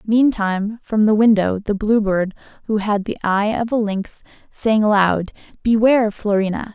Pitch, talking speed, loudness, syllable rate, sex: 210 Hz, 160 wpm, -18 LUFS, 4.6 syllables/s, female